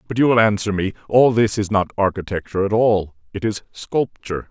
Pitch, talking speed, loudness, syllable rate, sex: 105 Hz, 185 wpm, -19 LUFS, 5.7 syllables/s, male